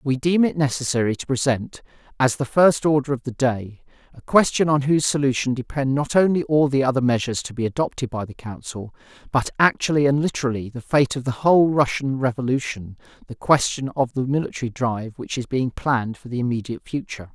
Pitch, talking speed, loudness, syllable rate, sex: 130 Hz, 195 wpm, -21 LUFS, 6.0 syllables/s, male